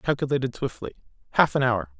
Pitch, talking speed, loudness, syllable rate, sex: 125 Hz, 180 wpm, -24 LUFS, 7.5 syllables/s, male